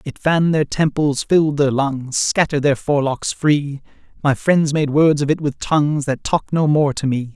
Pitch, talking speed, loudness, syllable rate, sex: 145 Hz, 205 wpm, -18 LUFS, 4.9 syllables/s, male